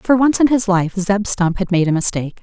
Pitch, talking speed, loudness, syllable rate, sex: 200 Hz, 270 wpm, -16 LUFS, 5.4 syllables/s, female